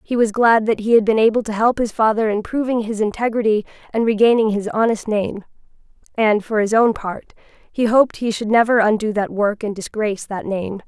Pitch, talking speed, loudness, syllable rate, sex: 220 Hz, 210 wpm, -18 LUFS, 5.5 syllables/s, female